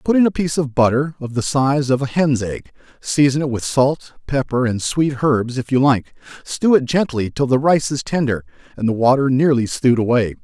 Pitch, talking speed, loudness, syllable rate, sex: 130 Hz, 220 wpm, -18 LUFS, 5.4 syllables/s, male